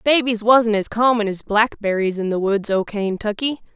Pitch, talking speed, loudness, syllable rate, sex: 215 Hz, 175 wpm, -19 LUFS, 4.7 syllables/s, female